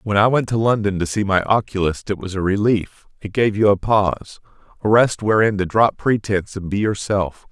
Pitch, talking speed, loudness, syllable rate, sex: 105 Hz, 215 wpm, -19 LUFS, 5.3 syllables/s, male